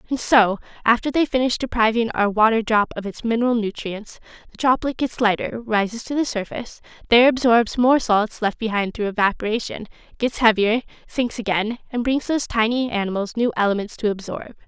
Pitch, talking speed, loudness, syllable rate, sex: 225 Hz, 170 wpm, -20 LUFS, 5.8 syllables/s, female